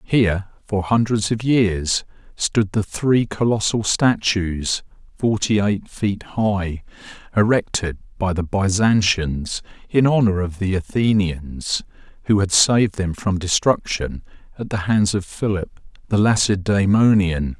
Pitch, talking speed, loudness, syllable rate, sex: 100 Hz, 125 wpm, -20 LUFS, 3.9 syllables/s, male